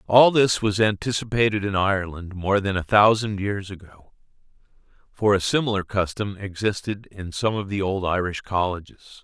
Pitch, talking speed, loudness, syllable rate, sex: 100 Hz, 155 wpm, -22 LUFS, 5.0 syllables/s, male